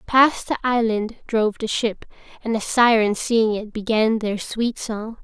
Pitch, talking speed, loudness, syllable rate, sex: 225 Hz, 170 wpm, -21 LUFS, 4.3 syllables/s, female